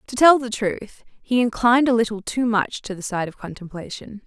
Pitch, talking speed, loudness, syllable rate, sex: 220 Hz, 210 wpm, -20 LUFS, 5.2 syllables/s, female